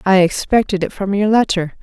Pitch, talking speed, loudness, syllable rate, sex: 195 Hz, 195 wpm, -16 LUFS, 5.4 syllables/s, female